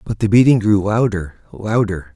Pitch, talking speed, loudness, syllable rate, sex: 105 Hz, 165 wpm, -16 LUFS, 4.8 syllables/s, male